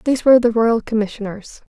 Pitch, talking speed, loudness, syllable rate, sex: 225 Hz, 170 wpm, -16 LUFS, 6.5 syllables/s, female